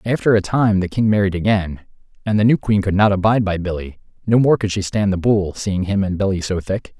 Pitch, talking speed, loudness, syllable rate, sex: 100 Hz, 240 wpm, -18 LUFS, 5.7 syllables/s, male